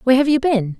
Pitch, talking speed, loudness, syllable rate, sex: 250 Hz, 300 wpm, -16 LUFS, 7.3 syllables/s, female